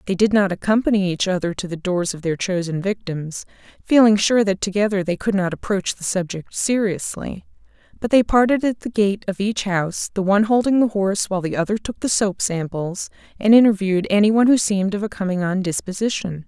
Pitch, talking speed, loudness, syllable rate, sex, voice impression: 200 Hz, 205 wpm, -19 LUFS, 5.8 syllables/s, female, very feminine, slightly middle-aged, thin, slightly tensed, slightly powerful, bright, soft, very clear, very fluent, cute, very intellectual, refreshing, very sincere, calm, very friendly, very reassuring, very elegant, sweet, very lively, kind, slightly intense, light